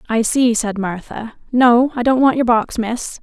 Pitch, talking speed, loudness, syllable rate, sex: 235 Hz, 205 wpm, -16 LUFS, 4.2 syllables/s, female